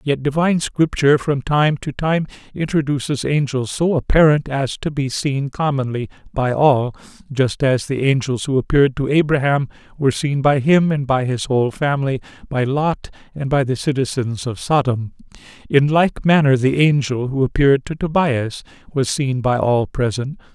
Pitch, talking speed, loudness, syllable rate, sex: 135 Hz, 165 wpm, -18 LUFS, 4.9 syllables/s, male